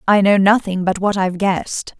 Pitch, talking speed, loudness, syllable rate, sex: 195 Hz, 210 wpm, -16 LUFS, 5.5 syllables/s, female